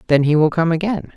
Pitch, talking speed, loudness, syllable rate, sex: 165 Hz, 260 wpm, -17 LUFS, 6.3 syllables/s, female